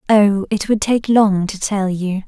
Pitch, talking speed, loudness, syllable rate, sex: 200 Hz, 210 wpm, -16 LUFS, 3.9 syllables/s, female